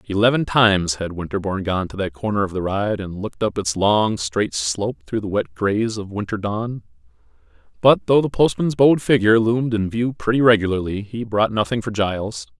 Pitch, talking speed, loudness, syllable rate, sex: 105 Hz, 195 wpm, -20 LUFS, 5.5 syllables/s, male